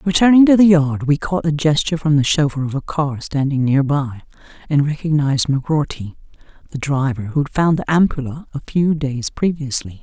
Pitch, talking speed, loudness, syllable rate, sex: 150 Hz, 185 wpm, -17 LUFS, 5.4 syllables/s, female